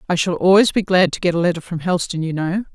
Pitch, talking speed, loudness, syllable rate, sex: 175 Hz, 285 wpm, -18 LUFS, 6.8 syllables/s, female